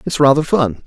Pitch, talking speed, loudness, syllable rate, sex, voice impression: 140 Hz, 210 wpm, -14 LUFS, 5.3 syllables/s, male, masculine, middle-aged, thick, tensed, powerful, bright, slightly hard, halting, mature, friendly, slightly reassuring, wild, lively, slightly kind, intense